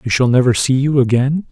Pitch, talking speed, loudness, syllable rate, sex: 130 Hz, 240 wpm, -14 LUFS, 5.7 syllables/s, male